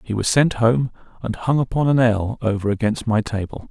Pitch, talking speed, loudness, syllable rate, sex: 115 Hz, 210 wpm, -20 LUFS, 5.2 syllables/s, male